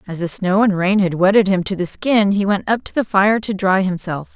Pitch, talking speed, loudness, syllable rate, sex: 195 Hz, 275 wpm, -17 LUFS, 5.2 syllables/s, female